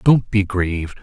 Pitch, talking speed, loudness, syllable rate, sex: 100 Hz, 175 wpm, -19 LUFS, 4.4 syllables/s, male